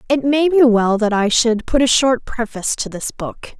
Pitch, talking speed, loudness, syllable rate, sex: 240 Hz, 235 wpm, -16 LUFS, 4.8 syllables/s, female